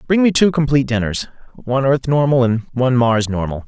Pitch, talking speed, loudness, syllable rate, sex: 130 Hz, 180 wpm, -16 LUFS, 6.1 syllables/s, male